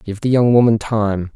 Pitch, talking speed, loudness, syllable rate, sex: 110 Hz, 220 wpm, -15 LUFS, 4.6 syllables/s, male